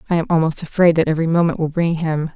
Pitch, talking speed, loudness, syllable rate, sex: 165 Hz, 255 wpm, -18 LUFS, 7.1 syllables/s, female